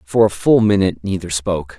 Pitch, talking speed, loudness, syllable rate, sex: 95 Hz, 200 wpm, -16 LUFS, 6.1 syllables/s, male